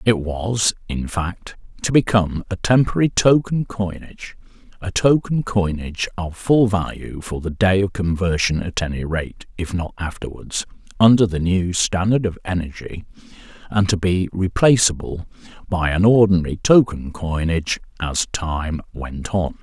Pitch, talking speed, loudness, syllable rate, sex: 95 Hz, 140 wpm, -19 LUFS, 4.6 syllables/s, male